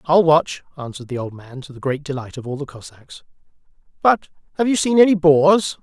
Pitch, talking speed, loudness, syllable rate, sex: 155 Hz, 205 wpm, -18 LUFS, 5.5 syllables/s, male